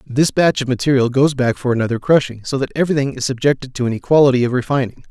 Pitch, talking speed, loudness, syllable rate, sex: 130 Hz, 225 wpm, -17 LUFS, 6.9 syllables/s, male